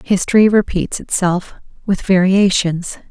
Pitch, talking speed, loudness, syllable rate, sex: 190 Hz, 75 wpm, -15 LUFS, 4.2 syllables/s, female